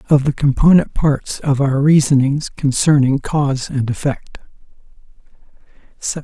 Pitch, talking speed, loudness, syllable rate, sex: 140 Hz, 115 wpm, -16 LUFS, 4.4 syllables/s, male